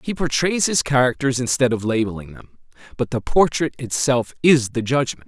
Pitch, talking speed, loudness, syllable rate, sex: 130 Hz, 170 wpm, -19 LUFS, 5.1 syllables/s, male